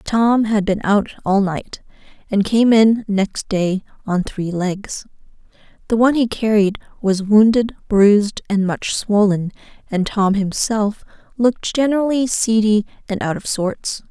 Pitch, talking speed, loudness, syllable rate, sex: 210 Hz, 145 wpm, -17 LUFS, 4.1 syllables/s, female